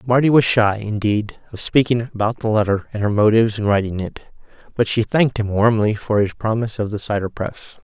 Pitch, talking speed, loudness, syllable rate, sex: 110 Hz, 205 wpm, -18 LUFS, 5.8 syllables/s, male